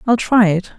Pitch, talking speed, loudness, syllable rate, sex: 210 Hz, 230 wpm, -14 LUFS, 4.7 syllables/s, female